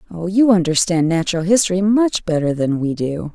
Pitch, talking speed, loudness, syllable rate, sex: 180 Hz, 180 wpm, -17 LUFS, 5.4 syllables/s, female